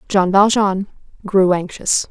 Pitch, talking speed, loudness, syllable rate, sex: 195 Hz, 115 wpm, -16 LUFS, 3.8 syllables/s, female